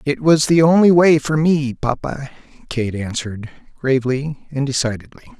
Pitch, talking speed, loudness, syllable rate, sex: 140 Hz, 145 wpm, -17 LUFS, 4.9 syllables/s, male